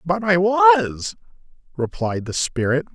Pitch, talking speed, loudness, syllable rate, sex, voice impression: 150 Hz, 120 wpm, -19 LUFS, 3.7 syllables/s, male, masculine, adult-like, thick, tensed, slightly powerful, bright, soft, cool, calm, friendly, reassuring, wild, lively, kind, slightly modest